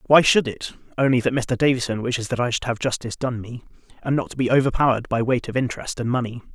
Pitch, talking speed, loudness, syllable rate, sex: 125 Hz, 240 wpm, -22 LUFS, 6.9 syllables/s, male